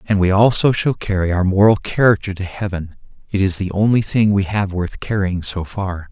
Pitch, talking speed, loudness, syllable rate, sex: 95 Hz, 205 wpm, -17 LUFS, 5.1 syllables/s, male